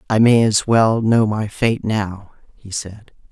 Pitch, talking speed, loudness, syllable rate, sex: 110 Hz, 180 wpm, -17 LUFS, 3.6 syllables/s, female